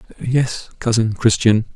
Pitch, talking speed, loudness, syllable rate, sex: 115 Hz, 105 wpm, -18 LUFS, 4.3 syllables/s, male